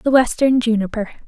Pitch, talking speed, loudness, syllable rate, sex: 235 Hz, 140 wpm, -17 LUFS, 5.6 syllables/s, female